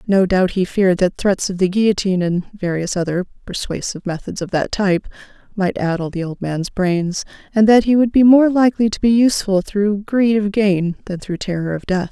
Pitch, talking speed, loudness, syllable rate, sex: 195 Hz, 210 wpm, -17 LUFS, 5.4 syllables/s, female